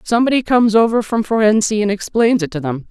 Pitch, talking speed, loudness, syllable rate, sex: 215 Hz, 205 wpm, -15 LUFS, 6.4 syllables/s, female